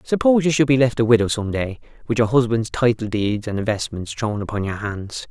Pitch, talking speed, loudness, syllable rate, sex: 115 Hz, 225 wpm, -20 LUFS, 5.7 syllables/s, male